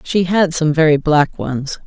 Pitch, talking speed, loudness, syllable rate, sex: 155 Hz, 195 wpm, -15 LUFS, 4.1 syllables/s, female